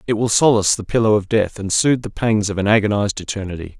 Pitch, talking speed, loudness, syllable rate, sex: 105 Hz, 235 wpm, -17 LUFS, 6.9 syllables/s, male